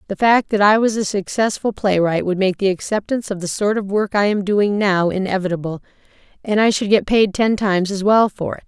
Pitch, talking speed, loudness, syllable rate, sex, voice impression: 200 Hz, 230 wpm, -18 LUFS, 5.6 syllables/s, female, feminine, adult-like, intellectual, slightly strict